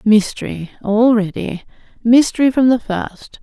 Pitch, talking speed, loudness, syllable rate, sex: 225 Hz, 90 wpm, -16 LUFS, 4.3 syllables/s, female